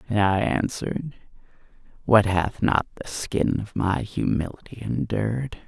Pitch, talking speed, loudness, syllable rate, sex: 105 Hz, 125 wpm, -24 LUFS, 4.4 syllables/s, male